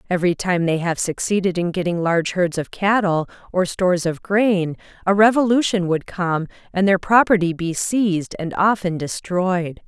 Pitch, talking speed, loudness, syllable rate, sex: 185 Hz, 165 wpm, -19 LUFS, 4.8 syllables/s, female